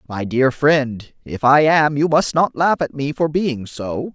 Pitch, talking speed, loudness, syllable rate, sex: 140 Hz, 215 wpm, -17 LUFS, 3.9 syllables/s, male